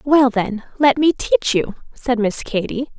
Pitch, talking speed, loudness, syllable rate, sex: 255 Hz, 180 wpm, -18 LUFS, 4.1 syllables/s, female